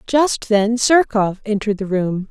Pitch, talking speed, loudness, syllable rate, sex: 215 Hz, 155 wpm, -17 LUFS, 4.2 syllables/s, female